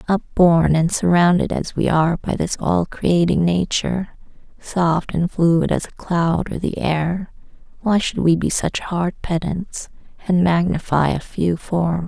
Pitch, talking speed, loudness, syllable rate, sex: 170 Hz, 160 wpm, -19 LUFS, 4.1 syllables/s, female